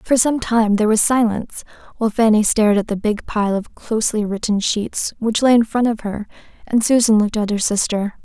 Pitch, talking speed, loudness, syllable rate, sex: 220 Hz, 210 wpm, -17 LUFS, 5.5 syllables/s, female